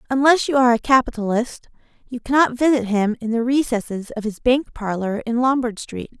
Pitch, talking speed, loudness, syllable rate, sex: 240 Hz, 185 wpm, -19 LUFS, 5.5 syllables/s, female